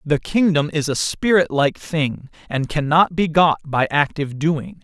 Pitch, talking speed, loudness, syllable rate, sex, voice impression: 155 Hz, 175 wpm, -19 LUFS, 4.3 syllables/s, male, very masculine, very middle-aged, very thick, tensed, powerful, very bright, soft, very clear, fluent, slightly raspy, cool, intellectual, very refreshing, sincere, calm, slightly mature, very friendly, very reassuring, very unique, slightly elegant, very wild, sweet, very lively, kind, intense